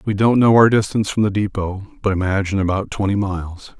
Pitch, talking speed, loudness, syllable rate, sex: 100 Hz, 205 wpm, -18 LUFS, 6.3 syllables/s, male